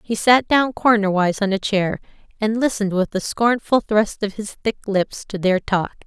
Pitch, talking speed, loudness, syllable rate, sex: 210 Hz, 200 wpm, -19 LUFS, 4.9 syllables/s, female